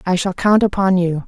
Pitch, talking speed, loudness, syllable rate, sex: 185 Hz, 235 wpm, -16 LUFS, 5.2 syllables/s, female